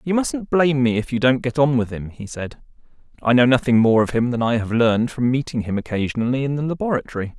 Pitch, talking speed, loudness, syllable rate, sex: 125 Hz, 245 wpm, -19 LUFS, 6.3 syllables/s, male